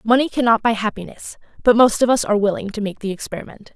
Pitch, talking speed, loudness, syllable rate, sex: 215 Hz, 225 wpm, -18 LUFS, 6.8 syllables/s, female